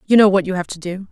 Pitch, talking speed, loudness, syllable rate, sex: 190 Hz, 380 wpm, -17 LUFS, 7.1 syllables/s, female